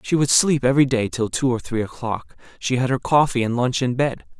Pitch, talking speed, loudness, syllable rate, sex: 125 Hz, 245 wpm, -20 LUFS, 5.5 syllables/s, male